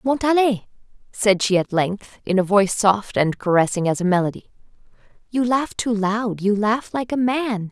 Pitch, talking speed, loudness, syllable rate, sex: 210 Hz, 170 wpm, -20 LUFS, 4.9 syllables/s, female